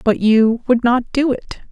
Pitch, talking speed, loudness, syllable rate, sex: 240 Hz, 210 wpm, -16 LUFS, 4.1 syllables/s, female